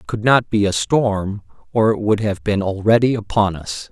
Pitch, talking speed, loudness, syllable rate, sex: 105 Hz, 215 wpm, -18 LUFS, 4.8 syllables/s, male